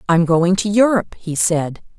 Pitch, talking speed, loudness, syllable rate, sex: 180 Hz, 180 wpm, -16 LUFS, 4.9 syllables/s, female